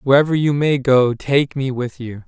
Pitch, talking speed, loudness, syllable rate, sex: 135 Hz, 210 wpm, -17 LUFS, 4.5 syllables/s, male